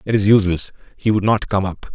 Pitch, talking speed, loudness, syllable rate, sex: 100 Hz, 245 wpm, -18 LUFS, 6.3 syllables/s, male